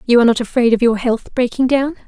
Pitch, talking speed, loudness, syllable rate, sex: 245 Hz, 260 wpm, -15 LUFS, 6.7 syllables/s, female